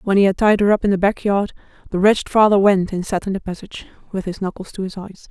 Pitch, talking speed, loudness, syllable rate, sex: 195 Hz, 285 wpm, -18 LUFS, 6.6 syllables/s, female